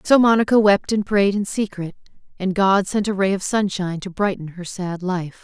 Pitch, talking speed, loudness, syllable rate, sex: 195 Hz, 210 wpm, -20 LUFS, 5.1 syllables/s, female